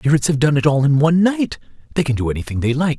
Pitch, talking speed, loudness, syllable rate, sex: 145 Hz, 300 wpm, -17 LUFS, 7.4 syllables/s, male